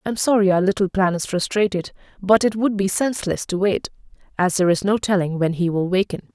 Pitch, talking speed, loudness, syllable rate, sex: 195 Hz, 225 wpm, -20 LUFS, 6.0 syllables/s, female